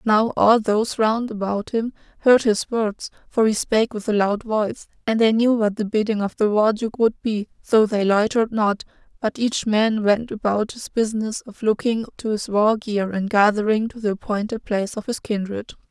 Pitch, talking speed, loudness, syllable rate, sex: 215 Hz, 205 wpm, -21 LUFS, 5.0 syllables/s, female